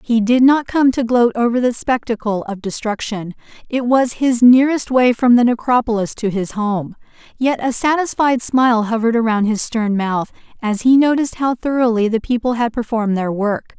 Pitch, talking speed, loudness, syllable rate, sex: 235 Hz, 185 wpm, -16 LUFS, 5.2 syllables/s, female